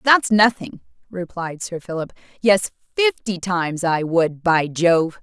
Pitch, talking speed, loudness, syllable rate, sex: 185 Hz, 140 wpm, -19 LUFS, 4.0 syllables/s, female